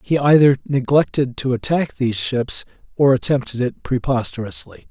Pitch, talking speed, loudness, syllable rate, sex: 130 Hz, 135 wpm, -18 LUFS, 4.9 syllables/s, male